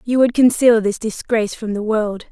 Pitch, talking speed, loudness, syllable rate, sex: 225 Hz, 205 wpm, -17 LUFS, 5.1 syllables/s, female